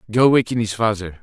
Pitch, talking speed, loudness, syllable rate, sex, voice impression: 110 Hz, 195 wpm, -18 LUFS, 6.1 syllables/s, male, very masculine, middle-aged, very thick, tensed, powerful, bright, soft, very clear, fluent, slightly raspy, cool, very intellectual, refreshing, sincere, calm, slightly mature, friendly, reassuring, unique, slightly elegant, wild, slightly sweet, lively, kind, modest